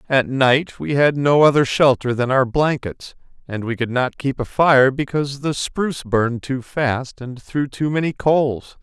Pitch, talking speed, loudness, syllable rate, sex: 135 Hz, 190 wpm, -18 LUFS, 4.5 syllables/s, male